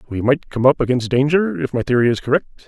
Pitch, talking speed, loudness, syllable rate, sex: 135 Hz, 245 wpm, -18 LUFS, 6.5 syllables/s, male